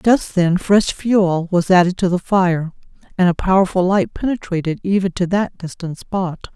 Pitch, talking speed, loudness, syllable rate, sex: 185 Hz, 175 wpm, -17 LUFS, 4.6 syllables/s, female